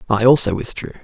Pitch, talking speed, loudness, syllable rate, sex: 115 Hz, 175 wpm, -15 LUFS, 6.5 syllables/s, male